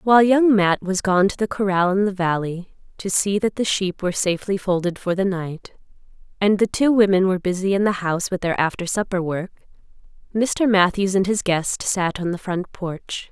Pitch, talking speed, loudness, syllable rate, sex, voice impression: 190 Hz, 205 wpm, -20 LUFS, 5.2 syllables/s, female, feminine, adult-like, tensed, soft, clear, raspy, intellectual, calm, reassuring, elegant, kind, slightly modest